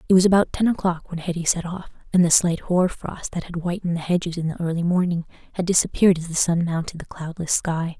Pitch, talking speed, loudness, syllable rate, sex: 175 Hz, 240 wpm, -22 LUFS, 6.3 syllables/s, female